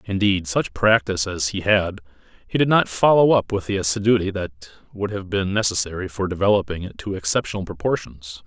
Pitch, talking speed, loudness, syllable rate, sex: 95 Hz, 175 wpm, -21 LUFS, 5.7 syllables/s, male